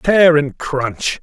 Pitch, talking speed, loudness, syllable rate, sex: 150 Hz, 145 wpm, -15 LUFS, 2.5 syllables/s, male